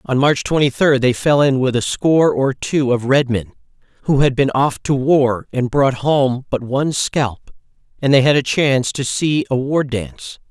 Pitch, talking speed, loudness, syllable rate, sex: 135 Hz, 210 wpm, -16 LUFS, 4.6 syllables/s, male